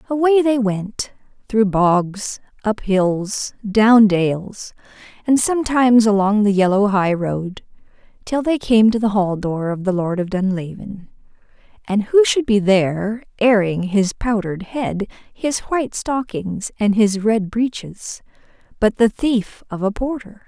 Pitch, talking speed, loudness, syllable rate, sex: 210 Hz, 145 wpm, -18 LUFS, 4.0 syllables/s, female